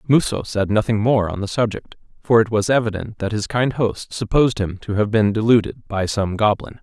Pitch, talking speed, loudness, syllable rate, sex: 110 Hz, 210 wpm, -19 LUFS, 5.4 syllables/s, male